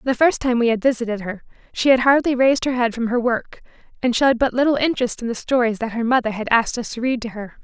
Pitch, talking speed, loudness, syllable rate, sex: 240 Hz, 265 wpm, -19 LUFS, 6.6 syllables/s, female